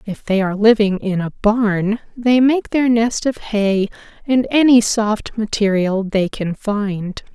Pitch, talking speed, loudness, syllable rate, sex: 215 Hz, 165 wpm, -17 LUFS, 3.8 syllables/s, female